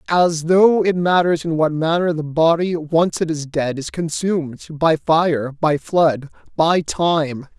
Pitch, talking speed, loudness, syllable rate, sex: 160 Hz, 165 wpm, -18 LUFS, 3.7 syllables/s, male